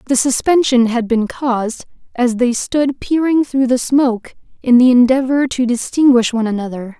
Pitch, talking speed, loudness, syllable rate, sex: 250 Hz, 165 wpm, -15 LUFS, 4.9 syllables/s, female